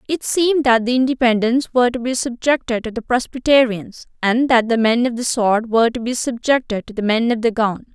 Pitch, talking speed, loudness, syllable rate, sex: 240 Hz, 220 wpm, -17 LUFS, 5.6 syllables/s, female